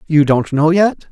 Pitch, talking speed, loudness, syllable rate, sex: 160 Hz, 215 wpm, -14 LUFS, 4.3 syllables/s, male